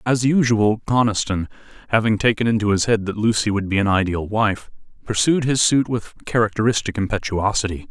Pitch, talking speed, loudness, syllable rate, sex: 110 Hz, 160 wpm, -19 LUFS, 5.6 syllables/s, male